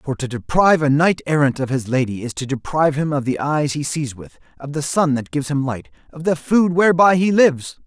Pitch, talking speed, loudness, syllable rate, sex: 145 Hz, 245 wpm, -18 LUFS, 5.8 syllables/s, male